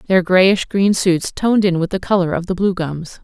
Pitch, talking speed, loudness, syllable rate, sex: 185 Hz, 240 wpm, -16 LUFS, 4.7 syllables/s, female